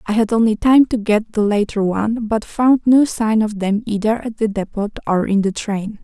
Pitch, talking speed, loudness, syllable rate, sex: 215 Hz, 230 wpm, -17 LUFS, 4.9 syllables/s, female